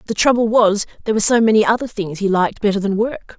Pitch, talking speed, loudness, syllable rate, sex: 215 Hz, 250 wpm, -16 LUFS, 7.0 syllables/s, female